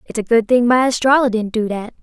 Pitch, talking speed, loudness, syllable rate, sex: 235 Hz, 265 wpm, -16 LUFS, 5.9 syllables/s, female